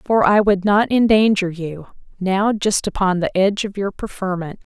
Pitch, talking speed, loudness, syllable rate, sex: 195 Hz, 175 wpm, -18 LUFS, 4.8 syllables/s, female